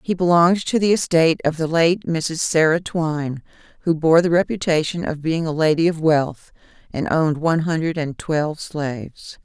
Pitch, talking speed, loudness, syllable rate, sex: 160 Hz, 180 wpm, -19 LUFS, 5.1 syllables/s, female